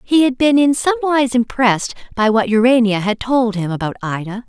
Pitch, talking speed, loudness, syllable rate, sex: 240 Hz, 190 wpm, -16 LUFS, 5.6 syllables/s, female